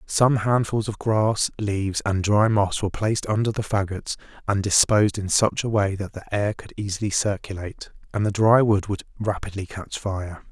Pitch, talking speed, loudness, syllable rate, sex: 105 Hz, 190 wpm, -23 LUFS, 5.0 syllables/s, male